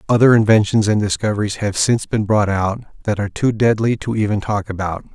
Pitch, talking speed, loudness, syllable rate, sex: 105 Hz, 200 wpm, -17 LUFS, 6.0 syllables/s, male